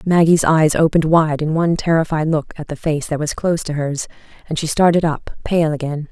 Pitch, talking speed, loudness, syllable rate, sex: 155 Hz, 215 wpm, -17 LUFS, 5.7 syllables/s, female